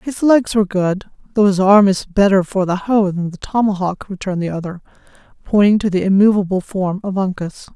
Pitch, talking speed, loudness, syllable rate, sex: 195 Hz, 195 wpm, -16 LUFS, 5.5 syllables/s, female